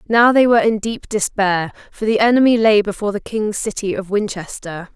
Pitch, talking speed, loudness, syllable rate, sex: 210 Hz, 195 wpm, -17 LUFS, 5.5 syllables/s, female